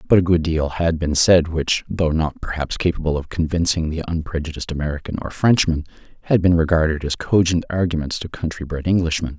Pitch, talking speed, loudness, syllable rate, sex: 80 Hz, 185 wpm, -20 LUFS, 5.8 syllables/s, male